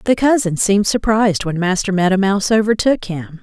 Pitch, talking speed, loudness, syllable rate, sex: 200 Hz, 175 wpm, -16 LUFS, 5.8 syllables/s, female